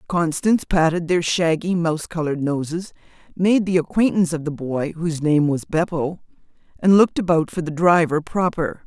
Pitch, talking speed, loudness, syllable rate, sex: 165 Hz, 160 wpm, -20 LUFS, 5.4 syllables/s, female